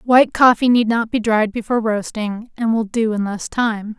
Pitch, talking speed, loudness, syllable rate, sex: 225 Hz, 210 wpm, -18 LUFS, 4.9 syllables/s, female